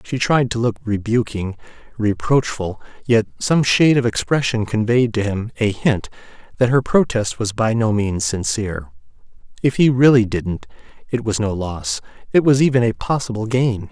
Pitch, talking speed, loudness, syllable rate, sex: 115 Hz, 160 wpm, -18 LUFS, 4.8 syllables/s, male